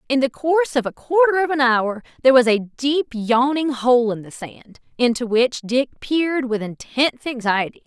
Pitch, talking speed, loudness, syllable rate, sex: 255 Hz, 190 wpm, -19 LUFS, 5.2 syllables/s, female